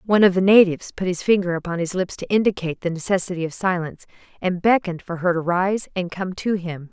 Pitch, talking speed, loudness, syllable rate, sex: 180 Hz, 225 wpm, -21 LUFS, 6.4 syllables/s, female